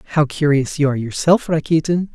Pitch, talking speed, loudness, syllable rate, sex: 150 Hz, 170 wpm, -17 LUFS, 6.0 syllables/s, male